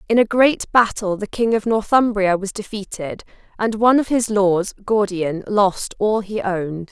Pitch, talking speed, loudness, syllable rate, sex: 205 Hz, 175 wpm, -19 LUFS, 4.5 syllables/s, female